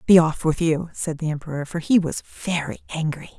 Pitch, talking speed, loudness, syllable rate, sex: 160 Hz, 210 wpm, -23 LUFS, 5.8 syllables/s, female